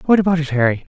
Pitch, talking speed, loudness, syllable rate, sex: 160 Hz, 255 wpm, -17 LUFS, 8.0 syllables/s, male